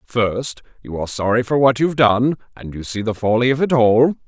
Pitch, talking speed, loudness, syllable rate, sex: 120 Hz, 225 wpm, -17 LUFS, 5.5 syllables/s, male